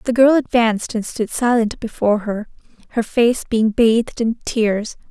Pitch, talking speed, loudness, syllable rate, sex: 230 Hz, 165 wpm, -18 LUFS, 4.7 syllables/s, female